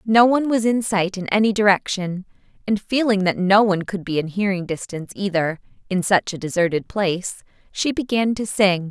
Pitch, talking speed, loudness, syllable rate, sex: 200 Hz, 190 wpm, -20 LUFS, 5.4 syllables/s, female